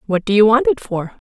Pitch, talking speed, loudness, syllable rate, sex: 220 Hz, 285 wpm, -15 LUFS, 5.8 syllables/s, female